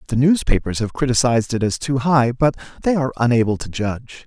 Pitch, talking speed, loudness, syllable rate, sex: 125 Hz, 195 wpm, -19 LUFS, 6.2 syllables/s, male